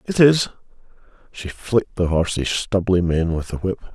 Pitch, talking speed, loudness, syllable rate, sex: 95 Hz, 165 wpm, -20 LUFS, 4.9 syllables/s, male